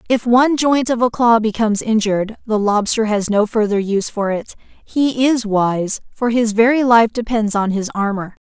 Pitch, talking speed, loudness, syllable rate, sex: 220 Hz, 190 wpm, -16 LUFS, 4.9 syllables/s, female